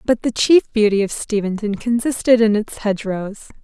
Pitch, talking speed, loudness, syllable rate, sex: 220 Hz, 165 wpm, -18 LUFS, 5.0 syllables/s, female